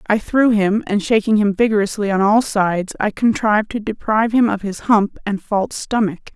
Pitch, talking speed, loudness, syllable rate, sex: 210 Hz, 200 wpm, -17 LUFS, 5.4 syllables/s, female